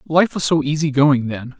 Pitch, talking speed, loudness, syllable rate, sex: 145 Hz, 225 wpm, -17 LUFS, 4.8 syllables/s, male